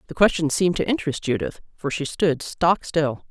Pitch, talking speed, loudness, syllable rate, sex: 165 Hz, 200 wpm, -22 LUFS, 5.4 syllables/s, female